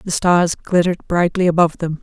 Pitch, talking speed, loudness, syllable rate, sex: 170 Hz, 180 wpm, -16 LUFS, 5.5 syllables/s, female